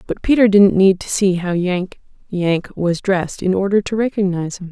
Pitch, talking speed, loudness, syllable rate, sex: 190 Hz, 205 wpm, -17 LUFS, 5.1 syllables/s, female